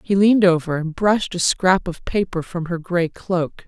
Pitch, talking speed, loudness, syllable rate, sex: 180 Hz, 210 wpm, -19 LUFS, 4.8 syllables/s, female